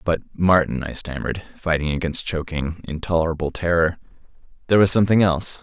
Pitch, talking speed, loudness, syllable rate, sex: 85 Hz, 140 wpm, -21 LUFS, 6.1 syllables/s, male